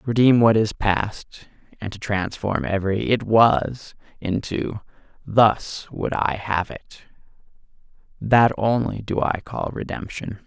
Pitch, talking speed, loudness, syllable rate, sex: 105 Hz, 125 wpm, -21 LUFS, 3.8 syllables/s, male